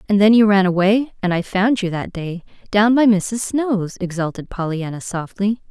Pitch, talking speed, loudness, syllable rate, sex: 200 Hz, 190 wpm, -18 LUFS, 4.7 syllables/s, female